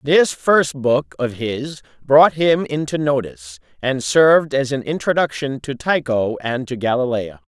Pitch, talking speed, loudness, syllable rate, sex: 135 Hz, 150 wpm, -18 LUFS, 4.2 syllables/s, male